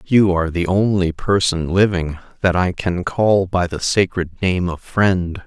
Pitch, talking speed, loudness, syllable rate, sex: 90 Hz, 175 wpm, -18 LUFS, 4.1 syllables/s, male